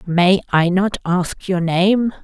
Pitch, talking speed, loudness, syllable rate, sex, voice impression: 185 Hz, 160 wpm, -17 LUFS, 3.3 syllables/s, female, feminine, adult-like, relaxed, slightly bright, soft, raspy, calm, slightly friendly, elegant, slightly kind, modest